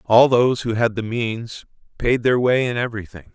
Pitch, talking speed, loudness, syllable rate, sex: 115 Hz, 200 wpm, -19 LUFS, 5.1 syllables/s, male